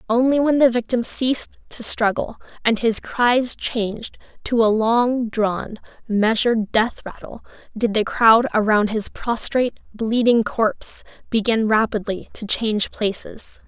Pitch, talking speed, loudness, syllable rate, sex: 225 Hz, 135 wpm, -20 LUFS, 4.2 syllables/s, female